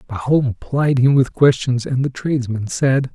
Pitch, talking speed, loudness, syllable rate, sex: 130 Hz, 170 wpm, -17 LUFS, 4.5 syllables/s, male